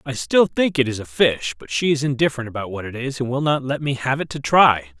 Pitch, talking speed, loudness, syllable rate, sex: 135 Hz, 290 wpm, -20 LUFS, 5.9 syllables/s, male